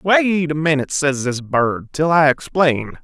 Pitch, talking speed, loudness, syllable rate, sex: 150 Hz, 180 wpm, -17 LUFS, 4.2 syllables/s, male